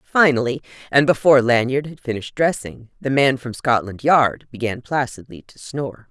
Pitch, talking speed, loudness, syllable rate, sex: 135 Hz, 155 wpm, -19 LUFS, 5.3 syllables/s, female